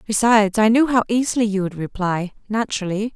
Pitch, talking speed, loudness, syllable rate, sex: 210 Hz, 150 wpm, -19 LUFS, 6.0 syllables/s, female